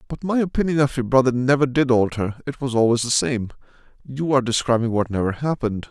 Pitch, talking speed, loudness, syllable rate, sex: 130 Hz, 205 wpm, -20 LUFS, 6.2 syllables/s, male